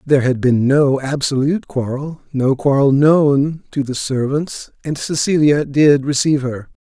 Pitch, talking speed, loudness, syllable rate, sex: 140 Hz, 150 wpm, -16 LUFS, 4.4 syllables/s, male